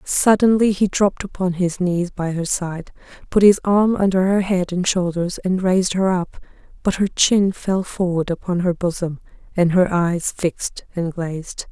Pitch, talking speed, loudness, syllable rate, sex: 180 Hz, 180 wpm, -19 LUFS, 4.5 syllables/s, female